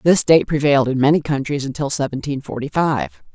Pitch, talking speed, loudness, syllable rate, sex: 145 Hz, 180 wpm, -18 LUFS, 5.7 syllables/s, female